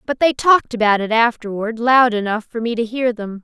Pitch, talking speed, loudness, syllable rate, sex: 230 Hz, 225 wpm, -17 LUFS, 5.4 syllables/s, female